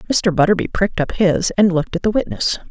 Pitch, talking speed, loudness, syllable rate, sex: 185 Hz, 220 wpm, -17 LUFS, 6.6 syllables/s, female